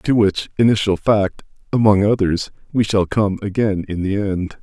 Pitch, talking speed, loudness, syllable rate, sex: 100 Hz, 170 wpm, -18 LUFS, 4.3 syllables/s, male